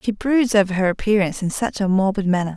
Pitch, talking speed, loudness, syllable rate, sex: 200 Hz, 235 wpm, -19 LUFS, 6.5 syllables/s, female